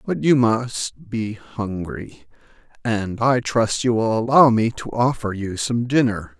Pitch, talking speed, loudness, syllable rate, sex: 115 Hz, 160 wpm, -20 LUFS, 3.7 syllables/s, male